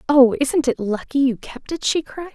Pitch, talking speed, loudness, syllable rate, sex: 270 Hz, 230 wpm, -19 LUFS, 4.9 syllables/s, female